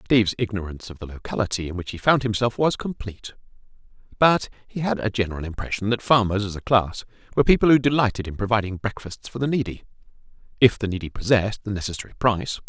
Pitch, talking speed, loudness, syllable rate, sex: 110 Hz, 190 wpm, -23 LUFS, 6.8 syllables/s, male